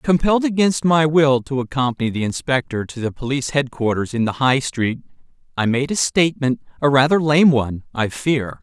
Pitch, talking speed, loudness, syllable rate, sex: 135 Hz, 180 wpm, -18 LUFS, 5.4 syllables/s, male